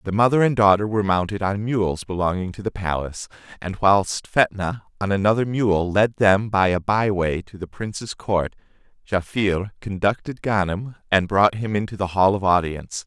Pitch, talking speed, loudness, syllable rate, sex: 100 Hz, 180 wpm, -21 LUFS, 4.9 syllables/s, male